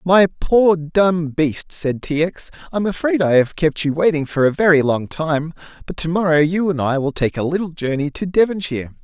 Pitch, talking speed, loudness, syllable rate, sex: 160 Hz, 210 wpm, -18 LUFS, 5.1 syllables/s, male